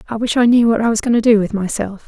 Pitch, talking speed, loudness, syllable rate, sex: 220 Hz, 345 wpm, -15 LUFS, 7.0 syllables/s, female